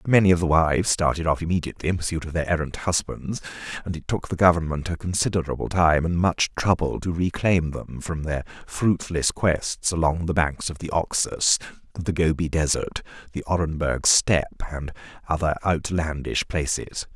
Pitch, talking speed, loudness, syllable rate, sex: 85 Hz, 165 wpm, -23 LUFS, 5.2 syllables/s, male